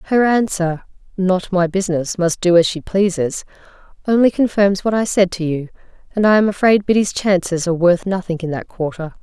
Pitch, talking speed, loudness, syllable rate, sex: 185 Hz, 190 wpm, -17 LUFS, 5.4 syllables/s, female